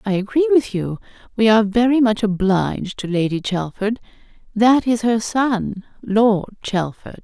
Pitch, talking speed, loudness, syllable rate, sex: 215 Hz, 135 wpm, -18 LUFS, 4.5 syllables/s, female